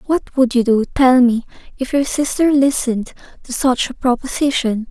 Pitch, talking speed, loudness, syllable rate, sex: 255 Hz, 170 wpm, -16 LUFS, 4.8 syllables/s, female